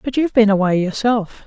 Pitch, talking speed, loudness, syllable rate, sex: 215 Hz, 205 wpm, -17 LUFS, 5.8 syllables/s, female